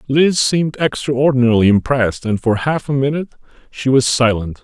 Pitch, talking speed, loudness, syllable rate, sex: 130 Hz, 155 wpm, -15 LUFS, 5.7 syllables/s, male